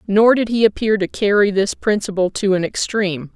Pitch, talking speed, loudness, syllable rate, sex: 205 Hz, 195 wpm, -17 LUFS, 5.3 syllables/s, female